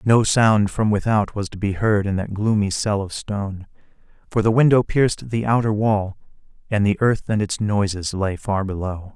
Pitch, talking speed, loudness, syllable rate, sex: 105 Hz, 195 wpm, -20 LUFS, 4.8 syllables/s, male